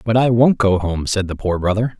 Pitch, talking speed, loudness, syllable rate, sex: 105 Hz, 270 wpm, -17 LUFS, 5.3 syllables/s, male